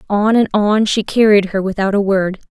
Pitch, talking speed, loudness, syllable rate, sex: 205 Hz, 215 wpm, -14 LUFS, 5.0 syllables/s, female